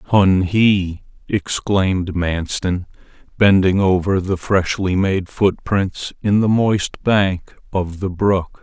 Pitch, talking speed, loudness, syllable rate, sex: 95 Hz, 120 wpm, -18 LUFS, 3.2 syllables/s, male